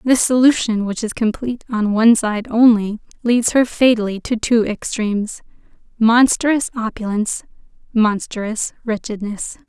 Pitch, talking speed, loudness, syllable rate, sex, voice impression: 225 Hz, 120 wpm, -17 LUFS, 4.5 syllables/s, female, feminine, slightly adult-like, calm, friendly, slightly elegant